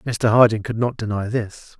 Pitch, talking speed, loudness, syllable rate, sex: 110 Hz, 200 wpm, -19 LUFS, 4.6 syllables/s, male